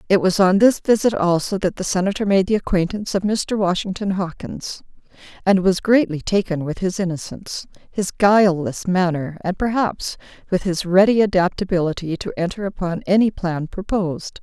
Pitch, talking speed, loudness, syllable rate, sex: 190 Hz, 160 wpm, -19 LUFS, 5.2 syllables/s, female